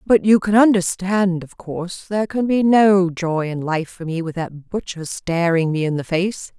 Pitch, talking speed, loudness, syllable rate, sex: 180 Hz, 210 wpm, -19 LUFS, 4.5 syllables/s, female